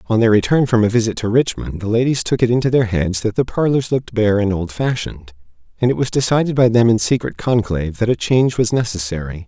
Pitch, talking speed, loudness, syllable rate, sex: 110 Hz, 230 wpm, -17 LUFS, 6.2 syllables/s, male